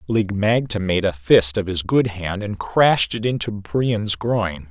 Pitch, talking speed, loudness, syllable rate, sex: 105 Hz, 190 wpm, -20 LUFS, 4.0 syllables/s, male